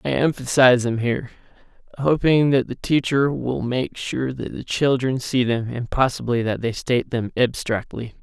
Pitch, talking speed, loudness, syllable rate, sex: 125 Hz, 170 wpm, -21 LUFS, 4.8 syllables/s, male